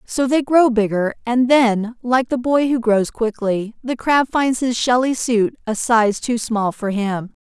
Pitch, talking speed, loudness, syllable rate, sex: 235 Hz, 195 wpm, -18 LUFS, 3.9 syllables/s, female